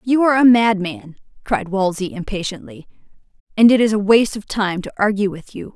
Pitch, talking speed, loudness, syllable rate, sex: 210 Hz, 190 wpm, -17 LUFS, 5.6 syllables/s, female